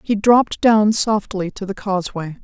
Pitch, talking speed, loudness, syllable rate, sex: 205 Hz, 170 wpm, -17 LUFS, 4.8 syllables/s, female